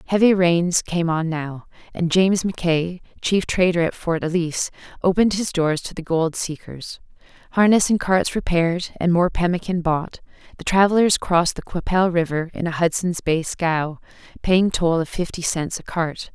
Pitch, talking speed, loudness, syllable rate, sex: 175 Hz, 170 wpm, -20 LUFS, 4.9 syllables/s, female